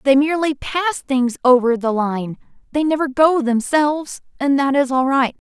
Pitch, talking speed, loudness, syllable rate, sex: 270 Hz, 165 wpm, -18 LUFS, 4.9 syllables/s, female